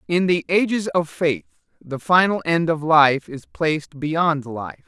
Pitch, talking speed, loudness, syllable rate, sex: 160 Hz, 170 wpm, -20 LUFS, 3.8 syllables/s, male